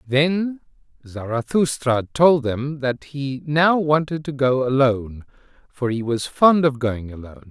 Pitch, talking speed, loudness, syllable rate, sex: 135 Hz, 145 wpm, -20 LUFS, 4.1 syllables/s, male